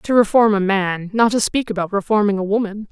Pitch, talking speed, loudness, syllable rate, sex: 205 Hz, 225 wpm, -17 LUFS, 5.6 syllables/s, female